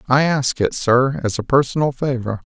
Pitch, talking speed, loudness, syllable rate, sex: 130 Hz, 190 wpm, -18 LUFS, 4.9 syllables/s, male